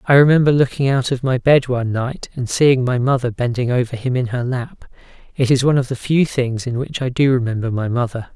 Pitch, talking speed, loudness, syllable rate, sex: 125 Hz, 230 wpm, -18 LUFS, 5.7 syllables/s, male